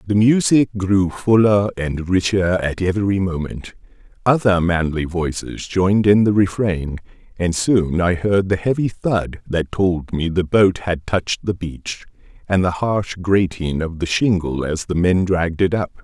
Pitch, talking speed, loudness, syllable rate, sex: 95 Hz, 170 wpm, -18 LUFS, 4.3 syllables/s, male